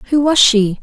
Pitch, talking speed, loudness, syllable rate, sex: 245 Hz, 220 wpm, -11 LUFS, 5.1 syllables/s, female